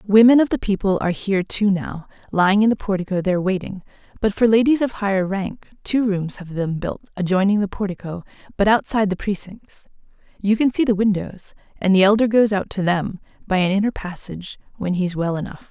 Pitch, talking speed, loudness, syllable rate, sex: 200 Hz, 195 wpm, -20 LUFS, 5.8 syllables/s, female